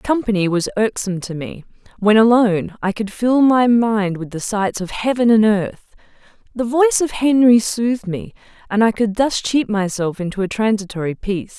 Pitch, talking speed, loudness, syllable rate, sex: 215 Hz, 180 wpm, -17 LUFS, 5.1 syllables/s, female